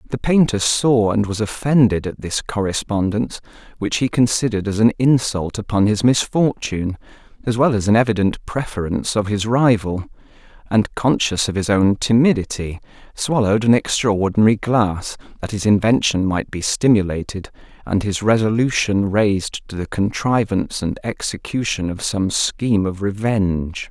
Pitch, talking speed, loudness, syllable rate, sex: 105 Hz, 145 wpm, -18 LUFS, 5.0 syllables/s, male